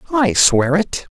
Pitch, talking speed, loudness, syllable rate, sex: 175 Hz, 155 wpm, -15 LUFS, 3.5 syllables/s, male